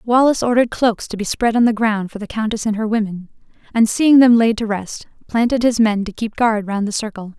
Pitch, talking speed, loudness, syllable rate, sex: 220 Hz, 245 wpm, -17 LUFS, 5.8 syllables/s, female